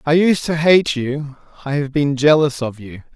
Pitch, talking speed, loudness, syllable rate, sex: 145 Hz, 210 wpm, -17 LUFS, 4.5 syllables/s, male